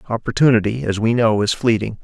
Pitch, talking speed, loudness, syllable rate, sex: 115 Hz, 175 wpm, -17 LUFS, 6.0 syllables/s, male